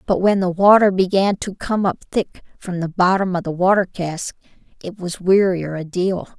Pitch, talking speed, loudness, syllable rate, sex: 185 Hz, 195 wpm, -18 LUFS, 4.8 syllables/s, female